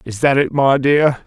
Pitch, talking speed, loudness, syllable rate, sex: 135 Hz, 235 wpm, -15 LUFS, 4.3 syllables/s, male